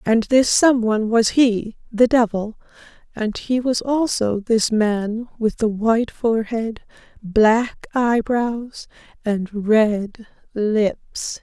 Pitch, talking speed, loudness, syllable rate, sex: 225 Hz, 105 wpm, -19 LUFS, 3.2 syllables/s, female